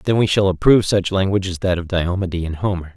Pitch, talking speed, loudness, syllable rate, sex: 95 Hz, 245 wpm, -18 LUFS, 6.5 syllables/s, male